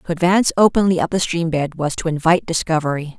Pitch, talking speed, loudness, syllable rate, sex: 165 Hz, 205 wpm, -18 LUFS, 6.7 syllables/s, female